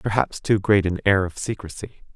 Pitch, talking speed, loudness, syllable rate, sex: 100 Hz, 195 wpm, -21 LUFS, 5.4 syllables/s, male